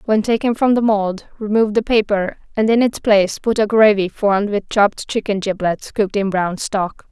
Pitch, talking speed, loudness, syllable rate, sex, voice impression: 210 Hz, 200 wpm, -17 LUFS, 5.2 syllables/s, female, feminine, adult-like, tensed, clear, fluent, intellectual, friendly, elegant, sharp